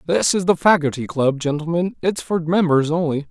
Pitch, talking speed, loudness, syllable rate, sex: 165 Hz, 180 wpm, -19 LUFS, 5.2 syllables/s, male